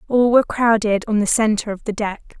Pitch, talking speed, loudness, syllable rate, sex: 220 Hz, 225 wpm, -18 LUFS, 5.9 syllables/s, female